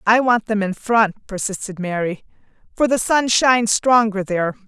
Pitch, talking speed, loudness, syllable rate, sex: 215 Hz, 165 wpm, -18 LUFS, 4.8 syllables/s, female